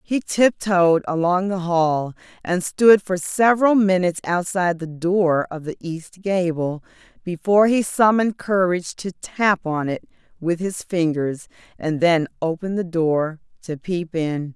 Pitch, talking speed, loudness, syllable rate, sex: 175 Hz, 150 wpm, -20 LUFS, 4.2 syllables/s, female